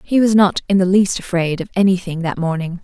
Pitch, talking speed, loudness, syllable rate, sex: 185 Hz, 235 wpm, -16 LUFS, 5.8 syllables/s, female